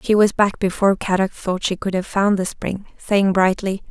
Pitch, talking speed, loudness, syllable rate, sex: 195 Hz, 215 wpm, -19 LUFS, 5.1 syllables/s, female